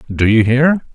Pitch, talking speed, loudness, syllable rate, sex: 125 Hz, 190 wpm, -13 LUFS, 4.5 syllables/s, male